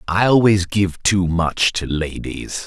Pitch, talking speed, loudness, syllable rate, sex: 90 Hz, 160 wpm, -18 LUFS, 3.6 syllables/s, male